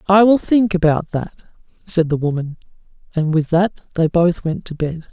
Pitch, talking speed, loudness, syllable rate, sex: 170 Hz, 190 wpm, -18 LUFS, 4.5 syllables/s, male